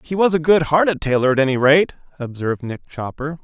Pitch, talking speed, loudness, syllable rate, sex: 150 Hz, 210 wpm, -17 LUFS, 6.0 syllables/s, male